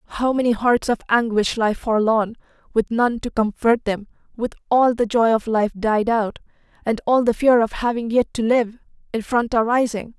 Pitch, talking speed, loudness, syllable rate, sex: 230 Hz, 190 wpm, -20 LUFS, 4.8 syllables/s, female